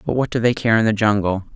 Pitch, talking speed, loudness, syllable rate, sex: 110 Hz, 310 wpm, -18 LUFS, 6.6 syllables/s, male